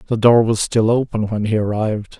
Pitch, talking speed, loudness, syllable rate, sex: 110 Hz, 220 wpm, -17 LUFS, 5.5 syllables/s, male